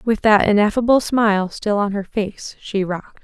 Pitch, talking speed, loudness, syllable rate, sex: 210 Hz, 185 wpm, -18 LUFS, 4.9 syllables/s, female